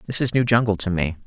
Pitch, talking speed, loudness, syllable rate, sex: 105 Hz, 285 wpm, -20 LUFS, 6.7 syllables/s, male